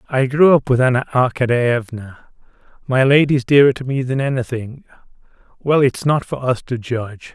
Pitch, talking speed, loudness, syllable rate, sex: 130 Hz, 165 wpm, -16 LUFS, 5.1 syllables/s, male